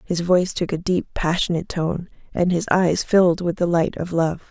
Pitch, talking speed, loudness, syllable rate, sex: 175 Hz, 215 wpm, -21 LUFS, 5.3 syllables/s, female